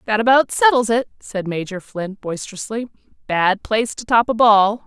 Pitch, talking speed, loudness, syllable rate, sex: 220 Hz, 175 wpm, -18 LUFS, 5.0 syllables/s, female